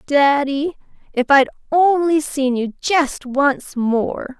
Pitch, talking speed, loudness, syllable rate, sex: 285 Hz, 125 wpm, -18 LUFS, 3.1 syllables/s, female